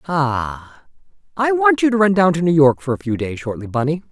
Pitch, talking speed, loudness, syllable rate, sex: 160 Hz, 235 wpm, -17 LUFS, 5.8 syllables/s, male